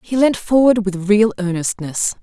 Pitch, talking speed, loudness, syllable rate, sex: 205 Hz, 160 wpm, -16 LUFS, 4.4 syllables/s, female